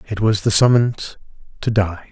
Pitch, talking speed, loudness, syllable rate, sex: 105 Hz, 170 wpm, -17 LUFS, 4.6 syllables/s, male